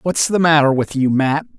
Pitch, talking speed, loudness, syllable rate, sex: 150 Hz, 225 wpm, -15 LUFS, 5.1 syllables/s, male